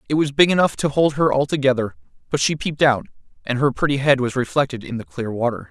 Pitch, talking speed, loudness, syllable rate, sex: 135 Hz, 230 wpm, -20 LUFS, 6.4 syllables/s, male